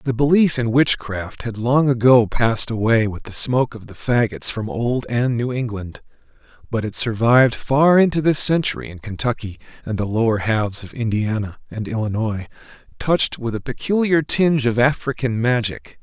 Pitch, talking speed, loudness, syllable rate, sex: 120 Hz, 165 wpm, -19 LUFS, 5.1 syllables/s, male